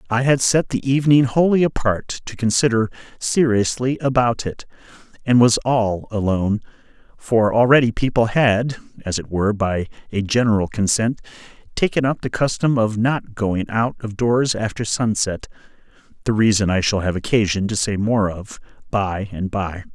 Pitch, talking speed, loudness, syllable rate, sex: 115 Hz, 155 wpm, -19 LUFS, 4.9 syllables/s, male